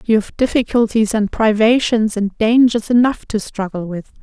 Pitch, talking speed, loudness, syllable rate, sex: 220 Hz, 155 wpm, -16 LUFS, 4.7 syllables/s, female